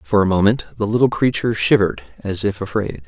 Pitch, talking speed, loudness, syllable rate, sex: 105 Hz, 195 wpm, -18 LUFS, 6.3 syllables/s, male